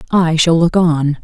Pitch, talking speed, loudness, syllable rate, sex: 165 Hz, 195 wpm, -13 LUFS, 4.0 syllables/s, female